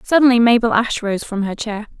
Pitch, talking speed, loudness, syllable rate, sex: 225 Hz, 210 wpm, -16 LUFS, 6.0 syllables/s, female